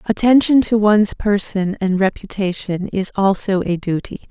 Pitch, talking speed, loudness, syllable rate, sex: 200 Hz, 140 wpm, -17 LUFS, 4.8 syllables/s, female